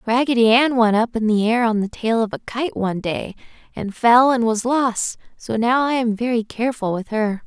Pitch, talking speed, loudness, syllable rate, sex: 230 Hz, 225 wpm, -19 LUFS, 5.1 syllables/s, female